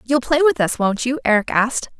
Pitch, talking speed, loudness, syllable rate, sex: 250 Hz, 240 wpm, -18 LUFS, 5.6 syllables/s, female